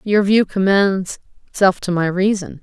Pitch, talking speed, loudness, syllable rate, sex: 190 Hz, 160 wpm, -17 LUFS, 4.4 syllables/s, female